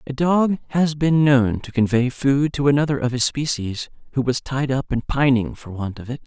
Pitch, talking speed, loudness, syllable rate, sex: 135 Hz, 220 wpm, -20 LUFS, 5.0 syllables/s, male